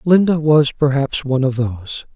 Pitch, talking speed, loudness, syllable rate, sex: 140 Hz, 165 wpm, -16 LUFS, 5.0 syllables/s, male